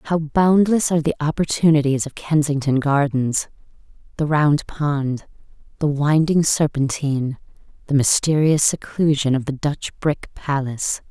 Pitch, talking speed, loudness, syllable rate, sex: 150 Hz, 115 wpm, -19 LUFS, 4.6 syllables/s, female